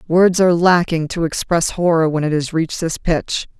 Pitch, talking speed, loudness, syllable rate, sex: 165 Hz, 200 wpm, -17 LUFS, 5.1 syllables/s, female